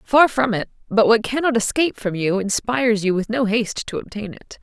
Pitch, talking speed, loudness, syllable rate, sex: 225 Hz, 220 wpm, -19 LUFS, 5.6 syllables/s, female